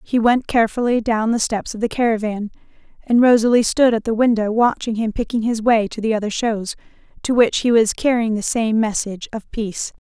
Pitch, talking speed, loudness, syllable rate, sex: 225 Hz, 205 wpm, -18 LUFS, 5.6 syllables/s, female